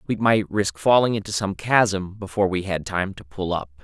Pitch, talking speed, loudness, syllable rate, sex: 95 Hz, 220 wpm, -22 LUFS, 5.0 syllables/s, male